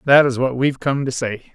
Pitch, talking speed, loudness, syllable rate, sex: 130 Hz, 270 wpm, -19 LUFS, 6.1 syllables/s, male